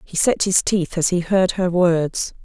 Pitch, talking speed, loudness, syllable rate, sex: 180 Hz, 220 wpm, -19 LUFS, 4.0 syllables/s, female